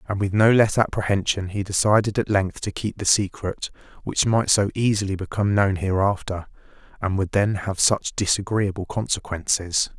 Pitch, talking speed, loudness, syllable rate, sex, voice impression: 100 Hz, 160 wpm, -22 LUFS, 5.1 syllables/s, male, masculine, adult-like, relaxed, slightly weak, soft, raspy, calm, slightly friendly, reassuring, slightly wild, kind, modest